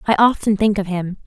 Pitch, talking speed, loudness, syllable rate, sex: 200 Hz, 235 wpm, -18 LUFS, 5.8 syllables/s, female